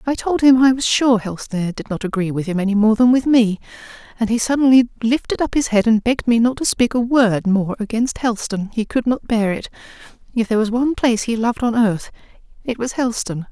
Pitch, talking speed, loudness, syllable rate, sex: 230 Hz, 235 wpm, -18 LUFS, 6.1 syllables/s, female